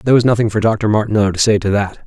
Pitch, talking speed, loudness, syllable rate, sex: 110 Hz, 290 wpm, -15 LUFS, 7.4 syllables/s, male